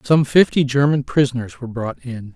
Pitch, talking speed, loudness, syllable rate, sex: 130 Hz, 180 wpm, -18 LUFS, 5.5 syllables/s, male